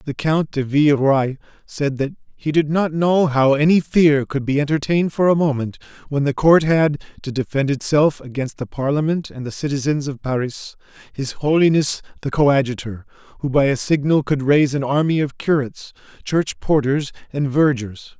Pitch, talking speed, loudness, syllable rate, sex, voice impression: 145 Hz, 170 wpm, -19 LUFS, 5.1 syllables/s, male, masculine, adult-like, slightly thick, bright, clear, slightly halting, sincere, friendly, slightly wild, slightly lively, kind, slightly modest